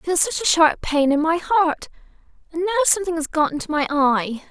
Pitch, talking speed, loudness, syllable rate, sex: 325 Hz, 225 wpm, -19 LUFS, 6.7 syllables/s, female